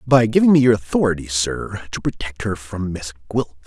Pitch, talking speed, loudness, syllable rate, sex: 105 Hz, 195 wpm, -19 LUFS, 5.3 syllables/s, male